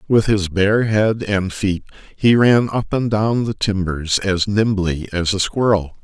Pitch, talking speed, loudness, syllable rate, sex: 100 Hz, 180 wpm, -18 LUFS, 3.9 syllables/s, male